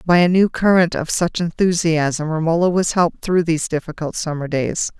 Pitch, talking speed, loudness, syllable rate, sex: 165 Hz, 180 wpm, -18 LUFS, 5.2 syllables/s, female